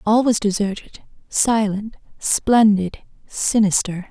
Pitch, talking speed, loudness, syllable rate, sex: 210 Hz, 90 wpm, -19 LUFS, 3.6 syllables/s, female